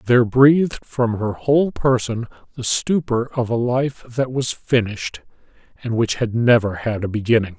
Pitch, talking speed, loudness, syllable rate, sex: 120 Hz, 165 wpm, -19 LUFS, 4.7 syllables/s, male